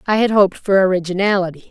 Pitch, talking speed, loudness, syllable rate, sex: 190 Hz, 175 wpm, -16 LUFS, 7.0 syllables/s, female